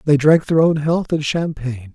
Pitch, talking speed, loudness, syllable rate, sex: 150 Hz, 215 wpm, -17 LUFS, 5.0 syllables/s, male